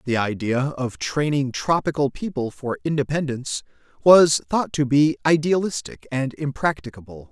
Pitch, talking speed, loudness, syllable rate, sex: 140 Hz, 125 wpm, -21 LUFS, 4.8 syllables/s, male